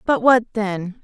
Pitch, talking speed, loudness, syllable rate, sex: 215 Hz, 175 wpm, -18 LUFS, 3.7 syllables/s, female